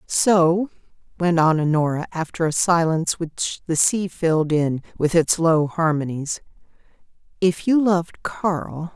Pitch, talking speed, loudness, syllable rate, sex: 165 Hz, 135 wpm, -20 LUFS, 4.1 syllables/s, female